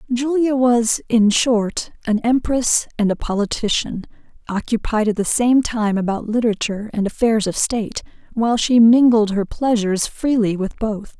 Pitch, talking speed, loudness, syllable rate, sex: 225 Hz, 150 wpm, -18 LUFS, 4.7 syllables/s, female